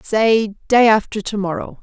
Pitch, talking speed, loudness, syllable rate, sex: 210 Hz, 165 wpm, -16 LUFS, 4.5 syllables/s, female